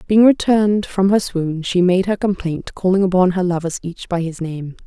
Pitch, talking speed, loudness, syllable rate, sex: 185 Hz, 210 wpm, -17 LUFS, 5.0 syllables/s, female